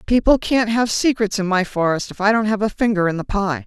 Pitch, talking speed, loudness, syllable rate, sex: 210 Hz, 260 wpm, -18 LUFS, 5.7 syllables/s, female